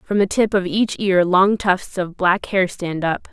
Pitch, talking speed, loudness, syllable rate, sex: 190 Hz, 235 wpm, -18 LUFS, 4.0 syllables/s, female